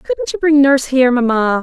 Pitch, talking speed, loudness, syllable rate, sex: 265 Hz, 220 wpm, -13 LUFS, 5.7 syllables/s, female